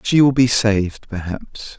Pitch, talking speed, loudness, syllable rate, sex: 110 Hz, 170 wpm, -17 LUFS, 4.2 syllables/s, male